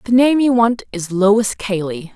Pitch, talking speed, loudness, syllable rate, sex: 215 Hz, 165 wpm, -16 LUFS, 4.2 syllables/s, female